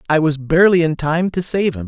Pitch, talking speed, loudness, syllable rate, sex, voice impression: 160 Hz, 255 wpm, -16 LUFS, 6.0 syllables/s, male, masculine, adult-like, tensed, bright, fluent, friendly, reassuring, unique, wild, slightly kind